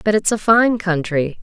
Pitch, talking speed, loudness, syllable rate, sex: 195 Hz, 210 wpm, -16 LUFS, 4.5 syllables/s, female